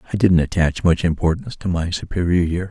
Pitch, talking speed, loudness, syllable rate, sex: 90 Hz, 200 wpm, -19 LUFS, 6.2 syllables/s, male